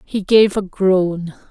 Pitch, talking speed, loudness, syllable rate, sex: 190 Hz, 160 wpm, -16 LUFS, 3.1 syllables/s, female